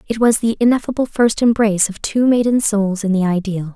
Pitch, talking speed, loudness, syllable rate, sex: 215 Hz, 210 wpm, -16 LUFS, 5.7 syllables/s, female